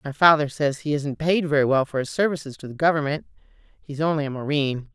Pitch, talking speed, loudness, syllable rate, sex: 145 Hz, 220 wpm, -22 LUFS, 6.3 syllables/s, female